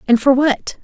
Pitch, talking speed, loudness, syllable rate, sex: 260 Hz, 215 wpm, -15 LUFS, 4.5 syllables/s, female